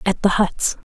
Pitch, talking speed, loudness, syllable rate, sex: 195 Hz, 200 wpm, -19 LUFS, 4.2 syllables/s, female